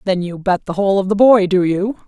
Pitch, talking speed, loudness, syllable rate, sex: 195 Hz, 290 wpm, -15 LUFS, 5.9 syllables/s, female